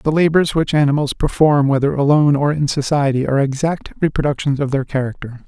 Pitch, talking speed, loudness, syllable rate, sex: 145 Hz, 175 wpm, -17 LUFS, 6.0 syllables/s, male